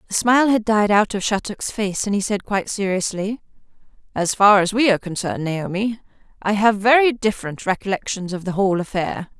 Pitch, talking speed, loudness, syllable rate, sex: 205 Hz, 185 wpm, -19 LUFS, 5.8 syllables/s, female